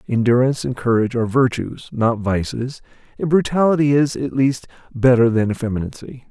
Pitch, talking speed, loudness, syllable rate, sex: 125 Hz, 145 wpm, -18 LUFS, 5.7 syllables/s, male